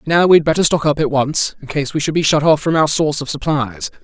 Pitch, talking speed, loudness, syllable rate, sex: 150 Hz, 295 wpm, -15 LUFS, 6.1 syllables/s, male